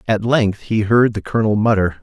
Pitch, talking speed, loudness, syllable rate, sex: 105 Hz, 205 wpm, -16 LUFS, 5.5 syllables/s, male